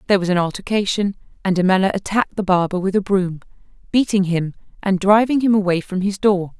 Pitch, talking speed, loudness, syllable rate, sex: 190 Hz, 190 wpm, -18 LUFS, 6.2 syllables/s, female